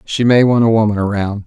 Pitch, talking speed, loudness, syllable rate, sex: 110 Hz, 245 wpm, -13 LUFS, 5.8 syllables/s, male